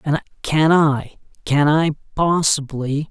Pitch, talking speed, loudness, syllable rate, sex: 150 Hz, 115 wpm, -18 LUFS, 3.5 syllables/s, male